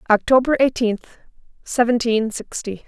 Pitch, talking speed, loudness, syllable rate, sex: 235 Hz, 85 wpm, -19 LUFS, 4.6 syllables/s, female